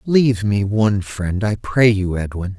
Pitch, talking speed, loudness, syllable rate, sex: 105 Hz, 185 wpm, -18 LUFS, 4.5 syllables/s, male